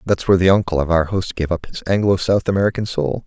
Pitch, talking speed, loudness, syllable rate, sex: 90 Hz, 255 wpm, -18 LUFS, 6.4 syllables/s, male